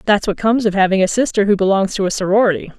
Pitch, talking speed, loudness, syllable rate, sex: 200 Hz, 260 wpm, -15 LUFS, 7.3 syllables/s, female